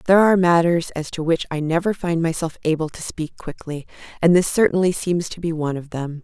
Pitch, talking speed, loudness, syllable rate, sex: 165 Hz, 220 wpm, -20 LUFS, 5.9 syllables/s, female